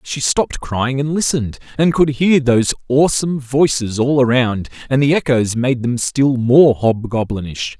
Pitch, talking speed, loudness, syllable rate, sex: 130 Hz, 160 wpm, -16 LUFS, 4.8 syllables/s, male